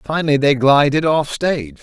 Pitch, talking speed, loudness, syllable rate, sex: 145 Hz, 165 wpm, -15 LUFS, 5.0 syllables/s, male